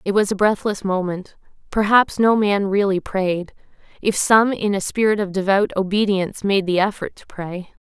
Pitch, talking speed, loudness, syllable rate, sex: 200 Hz, 175 wpm, -19 LUFS, 4.8 syllables/s, female